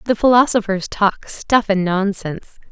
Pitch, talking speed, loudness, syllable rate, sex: 205 Hz, 130 wpm, -17 LUFS, 4.6 syllables/s, female